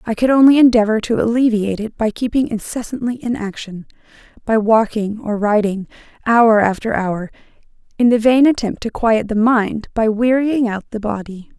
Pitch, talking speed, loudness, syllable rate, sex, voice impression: 225 Hz, 165 wpm, -16 LUFS, 5.2 syllables/s, female, feminine, adult-like, fluent, slightly intellectual, slightly sharp